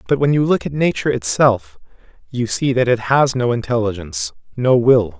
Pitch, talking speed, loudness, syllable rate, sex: 120 Hz, 185 wpm, -17 LUFS, 5.4 syllables/s, male